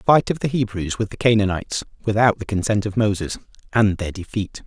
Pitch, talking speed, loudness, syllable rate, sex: 105 Hz, 195 wpm, -21 LUFS, 5.8 syllables/s, male